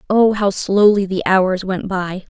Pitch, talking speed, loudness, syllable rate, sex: 195 Hz, 180 wpm, -16 LUFS, 3.9 syllables/s, female